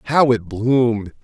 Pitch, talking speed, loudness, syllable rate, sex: 115 Hz, 145 wpm, -17 LUFS, 4.1 syllables/s, male